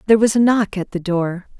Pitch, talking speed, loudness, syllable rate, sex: 200 Hz, 265 wpm, -18 LUFS, 6.0 syllables/s, female